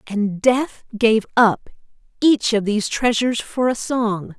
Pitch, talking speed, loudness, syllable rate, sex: 225 Hz, 150 wpm, -19 LUFS, 4.1 syllables/s, female